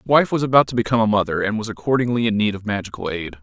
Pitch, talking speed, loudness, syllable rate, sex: 115 Hz, 280 wpm, -20 LUFS, 7.5 syllables/s, male